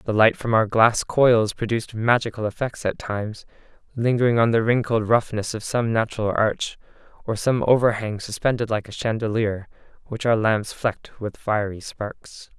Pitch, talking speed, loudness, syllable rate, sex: 110 Hz, 160 wpm, -22 LUFS, 4.9 syllables/s, male